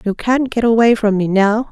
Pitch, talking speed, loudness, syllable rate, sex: 220 Hz, 245 wpm, -14 LUFS, 5.0 syllables/s, female